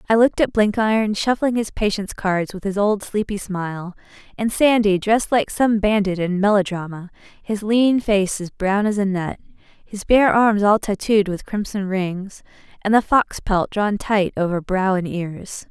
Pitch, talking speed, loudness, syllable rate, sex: 205 Hz, 180 wpm, -19 LUFS, 4.6 syllables/s, female